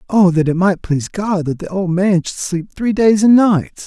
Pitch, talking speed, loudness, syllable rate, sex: 185 Hz, 250 wpm, -15 LUFS, 4.6 syllables/s, male